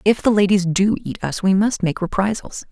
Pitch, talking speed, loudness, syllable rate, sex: 195 Hz, 220 wpm, -19 LUFS, 5.2 syllables/s, female